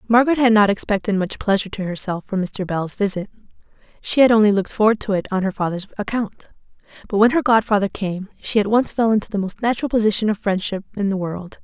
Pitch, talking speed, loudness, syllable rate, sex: 205 Hz, 210 wpm, -19 LUFS, 6.4 syllables/s, female